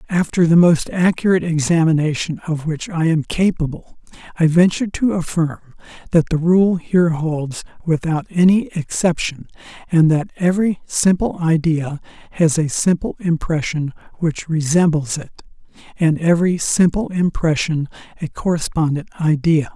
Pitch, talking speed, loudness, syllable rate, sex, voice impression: 165 Hz, 125 wpm, -18 LUFS, 4.7 syllables/s, male, very masculine, old, slightly thick, relaxed, slightly weak, slightly dark, slightly soft, muffled, slightly halting, very raspy, slightly cool, intellectual, sincere, very calm, very mature, friendly, reassuring, very unique, slightly elegant, wild, sweet, slightly lively, kind, modest